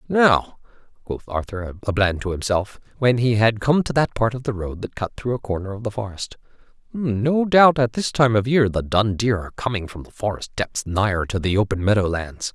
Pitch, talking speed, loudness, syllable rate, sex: 110 Hz, 225 wpm, -21 LUFS, 5.2 syllables/s, male